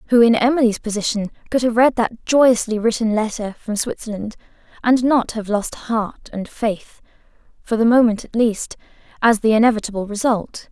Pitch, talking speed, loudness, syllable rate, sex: 225 Hz, 160 wpm, -18 LUFS, 4.9 syllables/s, female